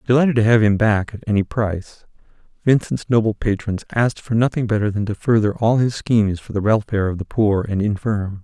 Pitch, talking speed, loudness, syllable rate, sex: 110 Hz, 205 wpm, -19 LUFS, 5.7 syllables/s, male